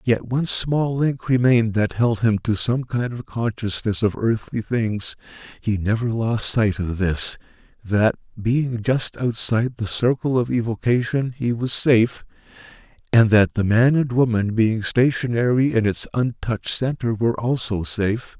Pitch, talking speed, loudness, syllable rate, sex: 115 Hz, 155 wpm, -21 LUFS, 4.4 syllables/s, male